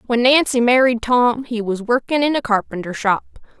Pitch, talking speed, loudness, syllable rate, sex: 240 Hz, 185 wpm, -17 LUFS, 5.1 syllables/s, female